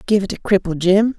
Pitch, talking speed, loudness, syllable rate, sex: 195 Hz, 255 wpm, -17 LUFS, 5.7 syllables/s, male